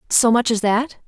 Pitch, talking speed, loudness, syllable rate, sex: 230 Hz, 225 wpm, -18 LUFS, 4.7 syllables/s, female